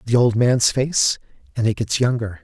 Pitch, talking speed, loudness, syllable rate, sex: 115 Hz, 200 wpm, -19 LUFS, 4.6 syllables/s, male